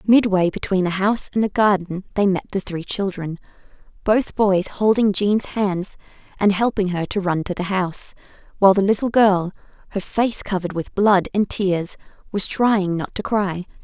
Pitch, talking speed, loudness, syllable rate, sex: 195 Hz, 180 wpm, -20 LUFS, 4.8 syllables/s, female